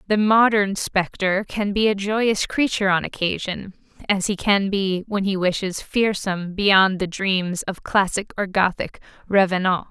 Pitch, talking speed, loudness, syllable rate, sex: 195 Hz, 160 wpm, -21 LUFS, 4.4 syllables/s, female